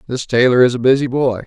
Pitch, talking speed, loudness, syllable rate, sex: 125 Hz, 245 wpm, -14 LUFS, 6.2 syllables/s, male